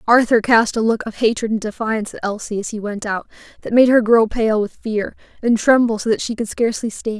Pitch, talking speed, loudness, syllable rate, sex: 225 Hz, 240 wpm, -18 LUFS, 5.7 syllables/s, female